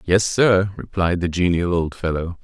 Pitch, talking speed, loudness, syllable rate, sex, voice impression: 90 Hz, 175 wpm, -20 LUFS, 4.4 syllables/s, male, masculine, middle-aged, tensed, powerful, slightly bright, slightly hard, clear, intellectual, calm, slightly mature, wild, lively